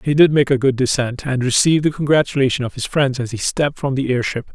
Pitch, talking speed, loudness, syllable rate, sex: 135 Hz, 250 wpm, -17 LUFS, 6.4 syllables/s, male